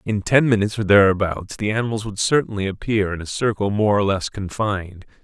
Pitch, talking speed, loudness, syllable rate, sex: 105 Hz, 195 wpm, -20 LUFS, 5.8 syllables/s, male